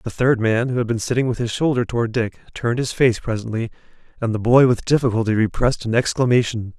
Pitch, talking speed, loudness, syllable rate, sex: 120 Hz, 210 wpm, -19 LUFS, 6.3 syllables/s, male